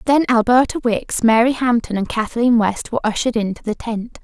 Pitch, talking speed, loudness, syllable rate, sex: 230 Hz, 185 wpm, -17 LUFS, 5.5 syllables/s, female